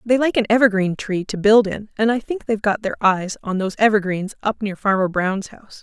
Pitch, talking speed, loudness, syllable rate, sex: 210 Hz, 235 wpm, -19 LUFS, 5.7 syllables/s, female